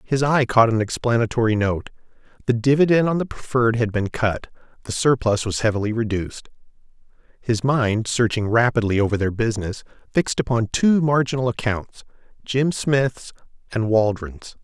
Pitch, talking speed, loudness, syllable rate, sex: 120 Hz, 140 wpm, -21 LUFS, 5.2 syllables/s, male